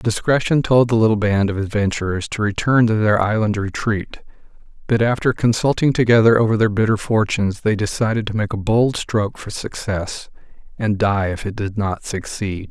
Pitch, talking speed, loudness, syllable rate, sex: 105 Hz, 175 wpm, -18 LUFS, 5.2 syllables/s, male